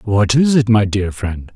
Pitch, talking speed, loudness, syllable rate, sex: 110 Hz, 230 wpm, -15 LUFS, 4.1 syllables/s, male